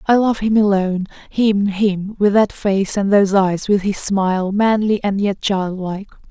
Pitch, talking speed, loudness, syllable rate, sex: 200 Hz, 180 wpm, -17 LUFS, 4.5 syllables/s, female